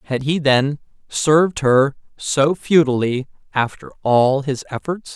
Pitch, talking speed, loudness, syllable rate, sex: 140 Hz, 130 wpm, -18 LUFS, 4.2 syllables/s, male